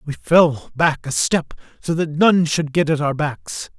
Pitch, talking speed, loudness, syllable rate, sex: 155 Hz, 205 wpm, -18 LUFS, 3.9 syllables/s, male